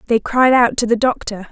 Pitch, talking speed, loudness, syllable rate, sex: 235 Hz, 240 wpm, -15 LUFS, 5.3 syllables/s, female